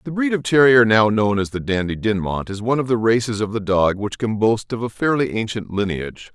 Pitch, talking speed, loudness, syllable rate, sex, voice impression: 110 Hz, 245 wpm, -19 LUFS, 5.6 syllables/s, male, very masculine, very adult-like, slightly old, very thick, very tensed, very powerful, bright, hard, very clear, fluent, slightly raspy, very cool, very intellectual, very sincere, very calm, very mature, very friendly, very reassuring, unique, slightly elegant, very wild, sweet, very lively, kind